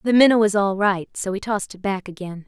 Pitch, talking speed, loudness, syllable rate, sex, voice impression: 200 Hz, 265 wpm, -20 LUFS, 5.9 syllables/s, female, feminine, adult-like, slightly relaxed, powerful, soft, fluent, raspy, intellectual, slightly calm, elegant, lively, slightly sharp